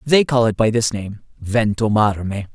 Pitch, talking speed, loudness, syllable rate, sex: 110 Hz, 140 wpm, -18 LUFS, 4.6 syllables/s, male